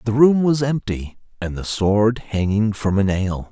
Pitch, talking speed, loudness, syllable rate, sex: 110 Hz, 190 wpm, -19 LUFS, 4.1 syllables/s, male